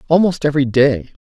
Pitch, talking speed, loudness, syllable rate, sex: 140 Hz, 145 wpm, -15 LUFS, 6.2 syllables/s, male